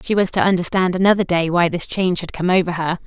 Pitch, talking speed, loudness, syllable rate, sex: 180 Hz, 255 wpm, -18 LUFS, 6.5 syllables/s, female